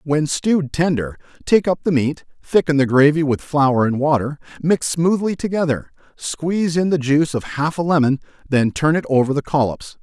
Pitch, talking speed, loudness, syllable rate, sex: 150 Hz, 185 wpm, -18 LUFS, 5.2 syllables/s, male